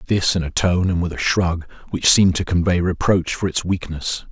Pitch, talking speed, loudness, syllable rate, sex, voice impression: 90 Hz, 225 wpm, -19 LUFS, 4.9 syllables/s, male, masculine, very adult-like, slightly intellectual, sincere, calm, reassuring